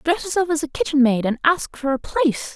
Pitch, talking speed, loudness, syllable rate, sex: 285 Hz, 260 wpm, -20 LUFS, 5.8 syllables/s, female